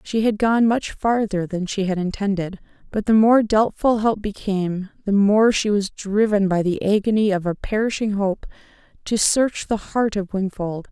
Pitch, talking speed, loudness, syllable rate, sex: 205 Hz, 180 wpm, -20 LUFS, 4.6 syllables/s, female